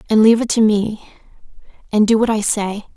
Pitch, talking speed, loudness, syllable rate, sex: 215 Hz, 205 wpm, -16 LUFS, 5.9 syllables/s, female